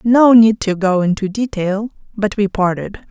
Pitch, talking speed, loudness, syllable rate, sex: 205 Hz, 175 wpm, -15 LUFS, 4.4 syllables/s, female